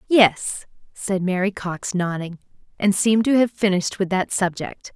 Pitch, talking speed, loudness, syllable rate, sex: 195 Hz, 160 wpm, -21 LUFS, 4.6 syllables/s, female